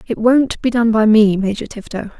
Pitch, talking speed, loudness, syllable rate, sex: 220 Hz, 220 wpm, -14 LUFS, 5.0 syllables/s, female